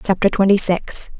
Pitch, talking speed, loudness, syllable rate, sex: 190 Hz, 150 wpm, -16 LUFS, 4.8 syllables/s, female